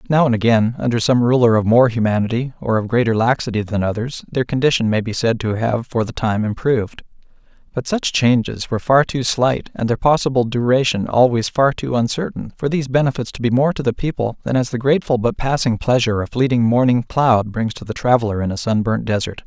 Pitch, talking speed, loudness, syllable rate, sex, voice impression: 120 Hz, 215 wpm, -18 LUFS, 5.8 syllables/s, male, masculine, adult-like, slightly refreshing, slightly sincere, friendly, slightly kind